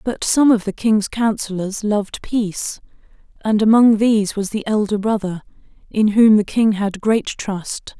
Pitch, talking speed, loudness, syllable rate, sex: 210 Hz, 165 wpm, -18 LUFS, 4.4 syllables/s, female